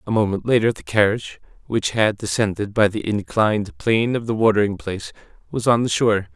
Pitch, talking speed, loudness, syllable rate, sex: 110 Hz, 190 wpm, -20 LUFS, 6.0 syllables/s, male